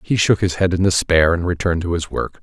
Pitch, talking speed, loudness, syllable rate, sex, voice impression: 85 Hz, 270 wpm, -18 LUFS, 6.0 syllables/s, male, very masculine, adult-like, slightly middle-aged, thick, tensed, powerful, slightly bright, slightly soft, slightly muffled, very fluent, slightly raspy, very cool, very intellectual, slightly refreshing, very sincere, very calm, very mature, very friendly, very reassuring, unique, very elegant, slightly wild, very sweet, slightly lively, very kind